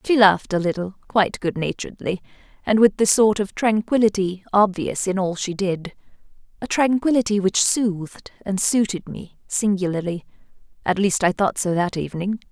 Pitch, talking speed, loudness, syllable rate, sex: 200 Hz, 155 wpm, -21 LUFS, 5.1 syllables/s, female